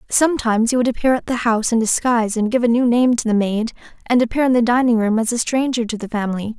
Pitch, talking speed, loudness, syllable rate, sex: 235 Hz, 265 wpm, -18 LUFS, 6.8 syllables/s, female